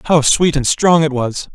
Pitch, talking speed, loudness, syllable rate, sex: 150 Hz, 235 wpm, -14 LUFS, 4.5 syllables/s, male